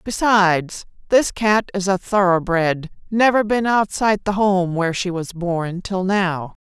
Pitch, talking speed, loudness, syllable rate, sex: 190 Hz, 155 wpm, -19 LUFS, 4.2 syllables/s, female